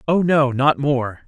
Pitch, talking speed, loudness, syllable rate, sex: 140 Hz, 190 wpm, -18 LUFS, 3.7 syllables/s, male